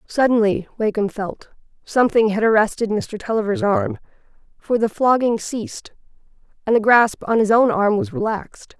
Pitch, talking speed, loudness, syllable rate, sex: 220 Hz, 150 wpm, -19 LUFS, 5.1 syllables/s, female